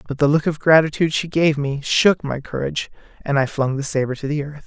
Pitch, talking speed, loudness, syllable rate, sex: 150 Hz, 245 wpm, -19 LUFS, 5.9 syllables/s, male